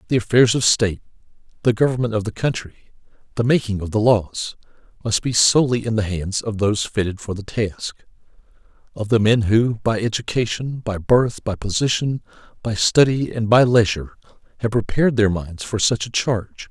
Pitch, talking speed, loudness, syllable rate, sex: 110 Hz, 170 wpm, -19 LUFS, 5.4 syllables/s, male